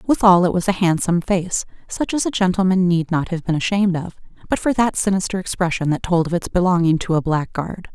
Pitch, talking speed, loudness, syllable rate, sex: 180 Hz, 220 wpm, -19 LUFS, 6.0 syllables/s, female